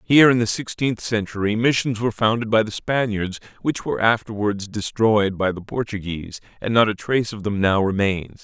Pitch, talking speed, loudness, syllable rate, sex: 110 Hz, 185 wpm, -21 LUFS, 5.4 syllables/s, male